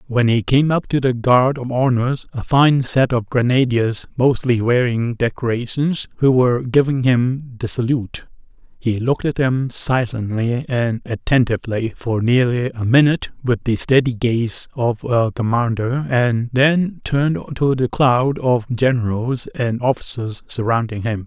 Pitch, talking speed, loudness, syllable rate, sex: 125 Hz, 150 wpm, -18 LUFS, 4.3 syllables/s, male